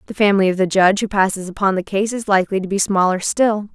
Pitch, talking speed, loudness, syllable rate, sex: 195 Hz, 255 wpm, -17 LUFS, 6.8 syllables/s, female